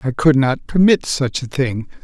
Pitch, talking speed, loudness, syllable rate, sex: 140 Hz, 205 wpm, -17 LUFS, 4.4 syllables/s, male